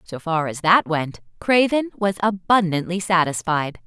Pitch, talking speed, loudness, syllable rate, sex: 180 Hz, 140 wpm, -20 LUFS, 4.3 syllables/s, female